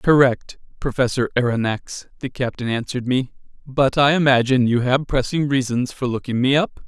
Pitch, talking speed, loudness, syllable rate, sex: 130 Hz, 155 wpm, -20 LUFS, 5.3 syllables/s, male